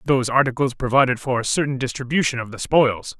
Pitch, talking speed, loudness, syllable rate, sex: 130 Hz, 190 wpm, -20 LUFS, 6.4 syllables/s, male